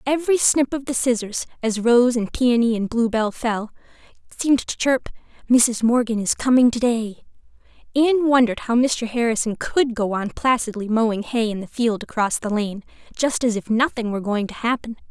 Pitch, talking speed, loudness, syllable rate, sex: 235 Hz, 180 wpm, -20 LUFS, 5.2 syllables/s, female